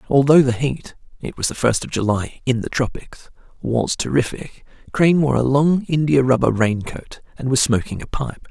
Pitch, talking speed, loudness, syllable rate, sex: 130 Hz, 175 wpm, -19 LUFS, 4.9 syllables/s, male